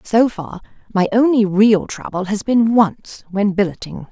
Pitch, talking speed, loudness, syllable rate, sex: 205 Hz, 160 wpm, -16 LUFS, 4.2 syllables/s, female